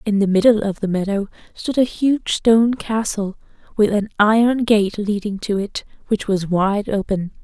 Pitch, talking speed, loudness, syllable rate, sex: 210 Hz, 175 wpm, -19 LUFS, 4.6 syllables/s, female